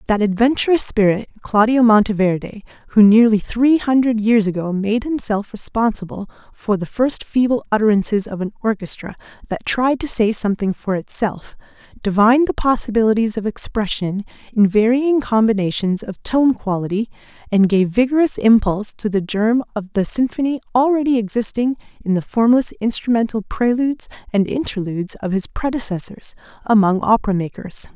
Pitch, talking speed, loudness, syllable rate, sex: 220 Hz, 140 wpm, -18 LUFS, 5.3 syllables/s, female